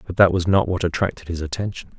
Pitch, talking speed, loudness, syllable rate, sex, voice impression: 90 Hz, 240 wpm, -21 LUFS, 6.7 syllables/s, male, masculine, adult-like, cool, sincere, calm